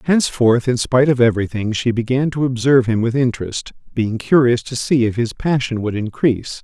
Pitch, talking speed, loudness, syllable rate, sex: 125 Hz, 190 wpm, -17 LUFS, 5.7 syllables/s, male